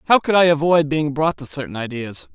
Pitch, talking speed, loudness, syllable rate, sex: 145 Hz, 230 wpm, -18 LUFS, 5.6 syllables/s, male